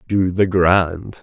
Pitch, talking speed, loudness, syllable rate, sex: 90 Hz, 145 wpm, -17 LUFS, 2.8 syllables/s, male